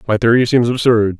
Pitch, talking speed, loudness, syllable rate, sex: 115 Hz, 200 wpm, -14 LUFS, 5.8 syllables/s, male